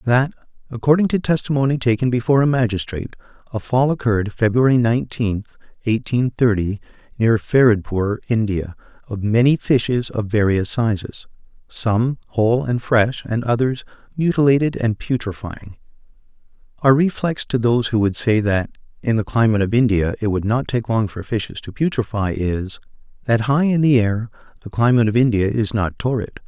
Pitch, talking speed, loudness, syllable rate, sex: 115 Hz, 150 wpm, -19 LUFS, 5.3 syllables/s, male